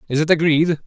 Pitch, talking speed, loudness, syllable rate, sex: 160 Hz, 210 wpm, -17 LUFS, 6.3 syllables/s, male